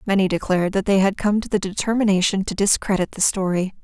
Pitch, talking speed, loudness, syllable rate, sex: 195 Hz, 205 wpm, -20 LUFS, 6.4 syllables/s, female